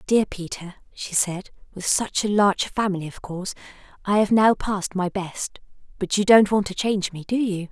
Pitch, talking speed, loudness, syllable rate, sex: 195 Hz, 200 wpm, -22 LUFS, 5.2 syllables/s, female